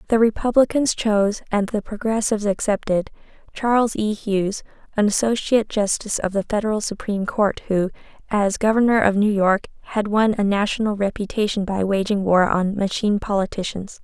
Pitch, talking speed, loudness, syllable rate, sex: 210 Hz, 150 wpm, -20 LUFS, 5.6 syllables/s, female